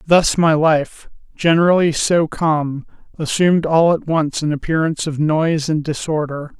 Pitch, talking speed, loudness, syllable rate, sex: 155 Hz, 145 wpm, -17 LUFS, 4.7 syllables/s, male